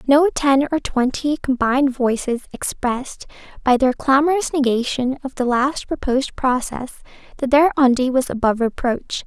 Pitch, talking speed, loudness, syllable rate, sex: 265 Hz, 140 wpm, -19 LUFS, 4.9 syllables/s, female